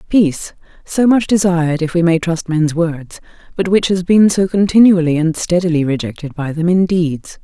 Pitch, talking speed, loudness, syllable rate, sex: 170 Hz, 185 wpm, -14 LUFS, 5.0 syllables/s, female